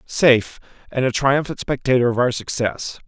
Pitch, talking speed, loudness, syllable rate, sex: 130 Hz, 155 wpm, -19 LUFS, 5.1 syllables/s, male